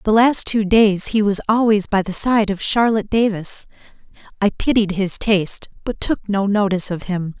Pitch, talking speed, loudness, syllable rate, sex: 205 Hz, 185 wpm, -17 LUFS, 4.9 syllables/s, female